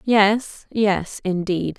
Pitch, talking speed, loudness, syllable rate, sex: 200 Hz, 100 wpm, -21 LUFS, 2.5 syllables/s, female